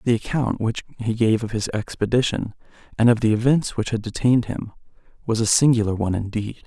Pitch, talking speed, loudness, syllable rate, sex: 115 Hz, 190 wpm, -21 LUFS, 6.0 syllables/s, male